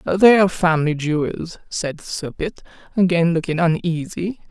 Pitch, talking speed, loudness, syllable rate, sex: 170 Hz, 135 wpm, -19 LUFS, 4.7 syllables/s, female